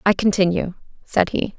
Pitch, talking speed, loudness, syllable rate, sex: 190 Hz, 150 wpm, -20 LUFS, 5.0 syllables/s, female